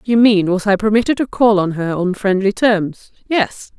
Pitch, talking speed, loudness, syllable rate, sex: 205 Hz, 220 wpm, -16 LUFS, 4.9 syllables/s, female